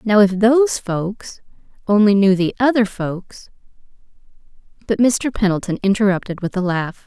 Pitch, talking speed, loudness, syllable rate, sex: 205 Hz, 135 wpm, -17 LUFS, 4.7 syllables/s, female